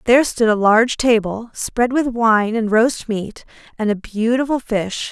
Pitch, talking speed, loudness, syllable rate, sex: 225 Hz, 175 wpm, -17 LUFS, 4.3 syllables/s, female